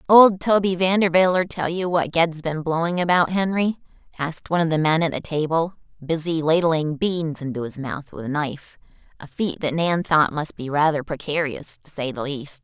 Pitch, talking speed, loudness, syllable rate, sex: 160 Hz, 195 wpm, -21 LUFS, 5.1 syllables/s, female